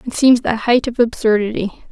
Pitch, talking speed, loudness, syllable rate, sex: 230 Hz, 190 wpm, -16 LUFS, 5.3 syllables/s, female